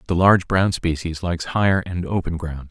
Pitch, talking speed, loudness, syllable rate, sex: 85 Hz, 200 wpm, -20 LUFS, 5.9 syllables/s, male